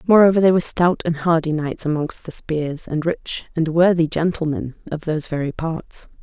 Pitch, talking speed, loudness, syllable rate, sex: 165 Hz, 185 wpm, -20 LUFS, 5.1 syllables/s, female